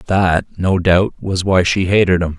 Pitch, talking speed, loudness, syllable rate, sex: 90 Hz, 200 wpm, -15 LUFS, 4.4 syllables/s, male